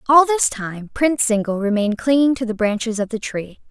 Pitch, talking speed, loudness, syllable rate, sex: 235 Hz, 210 wpm, -19 LUFS, 5.6 syllables/s, female